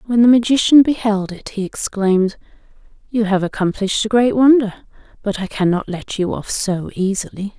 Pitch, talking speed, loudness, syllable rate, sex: 210 Hz, 165 wpm, -17 LUFS, 5.3 syllables/s, female